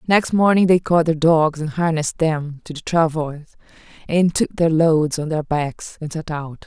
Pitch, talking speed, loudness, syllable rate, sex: 160 Hz, 200 wpm, -19 LUFS, 4.6 syllables/s, female